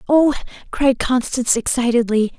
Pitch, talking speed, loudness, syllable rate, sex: 250 Hz, 100 wpm, -17 LUFS, 5.0 syllables/s, female